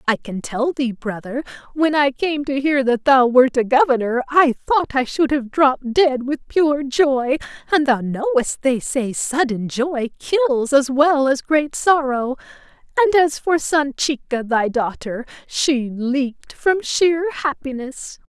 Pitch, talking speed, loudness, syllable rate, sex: 275 Hz, 160 wpm, -18 LUFS, 3.9 syllables/s, female